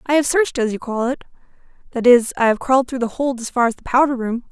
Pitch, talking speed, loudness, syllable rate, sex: 250 Hz, 265 wpm, -18 LUFS, 6.6 syllables/s, female